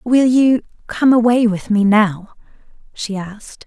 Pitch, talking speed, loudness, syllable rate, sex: 220 Hz, 145 wpm, -15 LUFS, 4.1 syllables/s, female